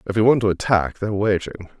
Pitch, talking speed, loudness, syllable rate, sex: 100 Hz, 235 wpm, -20 LUFS, 7.0 syllables/s, male